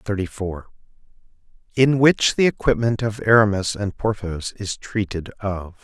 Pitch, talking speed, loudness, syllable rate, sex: 105 Hz, 135 wpm, -21 LUFS, 4.3 syllables/s, male